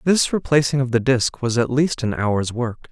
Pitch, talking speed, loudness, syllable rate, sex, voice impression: 130 Hz, 225 wpm, -20 LUFS, 4.7 syllables/s, male, masculine, adult-like, slightly dark, sweet